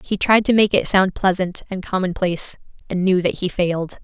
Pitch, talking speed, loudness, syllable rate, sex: 185 Hz, 210 wpm, -19 LUFS, 5.4 syllables/s, female